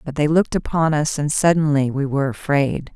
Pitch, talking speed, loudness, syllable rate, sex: 150 Hz, 205 wpm, -19 LUFS, 5.6 syllables/s, female